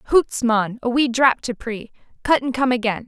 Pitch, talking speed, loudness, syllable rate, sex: 240 Hz, 215 wpm, -20 LUFS, 4.4 syllables/s, female